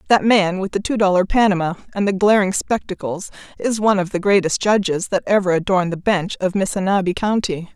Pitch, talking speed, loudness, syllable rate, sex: 190 Hz, 195 wpm, -18 LUFS, 5.9 syllables/s, female